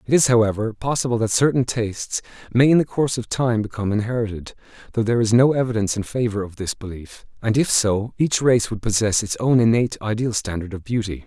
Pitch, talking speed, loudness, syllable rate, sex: 110 Hz, 210 wpm, -20 LUFS, 6.2 syllables/s, male